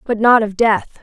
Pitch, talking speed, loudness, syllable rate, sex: 220 Hz, 235 wpm, -14 LUFS, 4.4 syllables/s, female